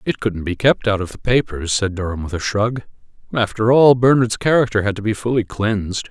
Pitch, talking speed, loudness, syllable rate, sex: 110 Hz, 215 wpm, -18 LUFS, 5.5 syllables/s, male